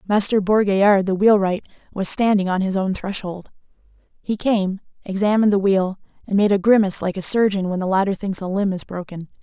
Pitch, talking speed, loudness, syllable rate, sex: 195 Hz, 190 wpm, -19 LUFS, 5.7 syllables/s, female